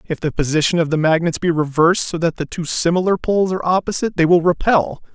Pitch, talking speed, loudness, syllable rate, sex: 170 Hz, 220 wpm, -17 LUFS, 6.5 syllables/s, male